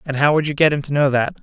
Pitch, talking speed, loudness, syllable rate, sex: 140 Hz, 380 wpm, -17 LUFS, 7.0 syllables/s, male